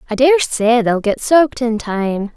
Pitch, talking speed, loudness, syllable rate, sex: 240 Hz, 205 wpm, -15 LUFS, 4.2 syllables/s, female